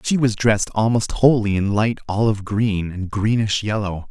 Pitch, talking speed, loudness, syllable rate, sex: 110 Hz, 175 wpm, -19 LUFS, 4.8 syllables/s, male